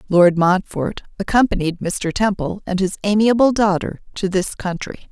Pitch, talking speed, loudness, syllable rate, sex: 190 Hz, 140 wpm, -19 LUFS, 4.7 syllables/s, female